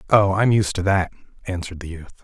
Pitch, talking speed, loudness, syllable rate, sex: 95 Hz, 240 wpm, -21 LUFS, 7.0 syllables/s, male